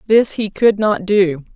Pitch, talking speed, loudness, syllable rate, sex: 200 Hz, 195 wpm, -15 LUFS, 3.9 syllables/s, female